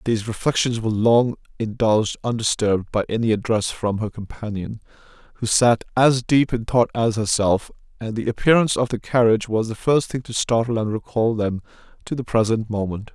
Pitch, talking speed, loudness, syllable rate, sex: 115 Hz, 180 wpm, -21 LUFS, 5.6 syllables/s, male